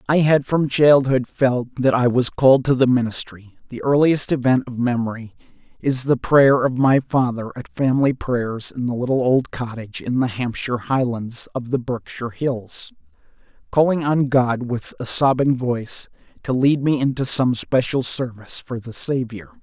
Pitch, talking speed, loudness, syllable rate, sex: 125 Hz, 170 wpm, -19 LUFS, 4.7 syllables/s, male